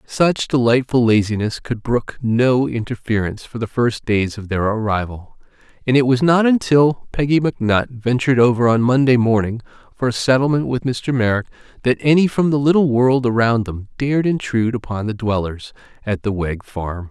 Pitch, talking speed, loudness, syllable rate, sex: 120 Hz, 170 wpm, -18 LUFS, 5.1 syllables/s, male